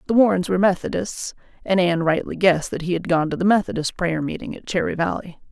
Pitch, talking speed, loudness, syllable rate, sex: 180 Hz, 220 wpm, -21 LUFS, 6.5 syllables/s, female